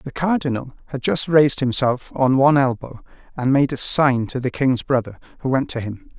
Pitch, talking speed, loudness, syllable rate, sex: 130 Hz, 205 wpm, -19 LUFS, 5.2 syllables/s, male